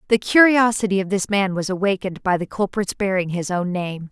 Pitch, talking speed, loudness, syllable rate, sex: 195 Hz, 205 wpm, -20 LUFS, 5.6 syllables/s, female